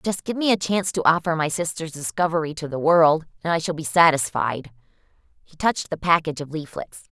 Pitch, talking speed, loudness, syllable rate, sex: 160 Hz, 200 wpm, -22 LUFS, 5.8 syllables/s, female